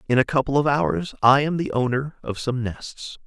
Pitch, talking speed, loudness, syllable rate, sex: 135 Hz, 220 wpm, -22 LUFS, 4.8 syllables/s, male